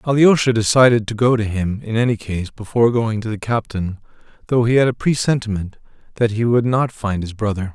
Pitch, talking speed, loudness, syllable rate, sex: 115 Hz, 200 wpm, -18 LUFS, 5.7 syllables/s, male